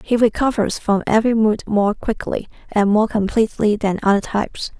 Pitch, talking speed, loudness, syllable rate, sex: 215 Hz, 165 wpm, -18 LUFS, 5.3 syllables/s, female